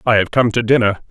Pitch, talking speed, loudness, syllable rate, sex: 115 Hz, 270 wpm, -15 LUFS, 6.5 syllables/s, male